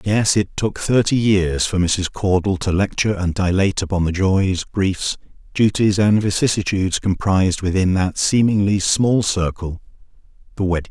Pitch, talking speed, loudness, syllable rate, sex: 95 Hz, 150 wpm, -18 LUFS, 4.9 syllables/s, male